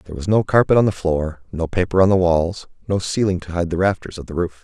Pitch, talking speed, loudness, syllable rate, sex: 90 Hz, 270 wpm, -19 LUFS, 6.2 syllables/s, male